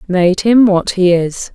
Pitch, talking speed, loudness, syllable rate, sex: 190 Hz, 195 wpm, -12 LUFS, 3.6 syllables/s, female